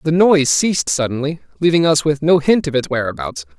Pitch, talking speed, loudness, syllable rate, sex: 145 Hz, 200 wpm, -16 LUFS, 6.0 syllables/s, male